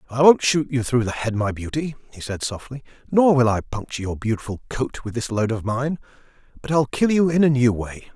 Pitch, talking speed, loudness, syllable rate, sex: 125 Hz, 235 wpm, -21 LUFS, 5.6 syllables/s, male